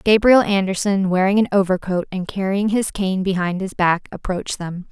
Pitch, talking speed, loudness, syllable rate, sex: 190 Hz, 170 wpm, -19 LUFS, 5.1 syllables/s, female